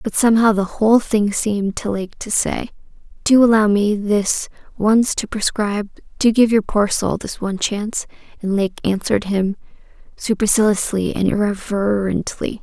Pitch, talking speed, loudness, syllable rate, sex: 210 Hz, 150 wpm, -18 LUFS, 4.8 syllables/s, female